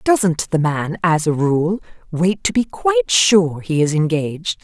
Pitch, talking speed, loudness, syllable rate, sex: 170 Hz, 180 wpm, -17 LUFS, 4.0 syllables/s, female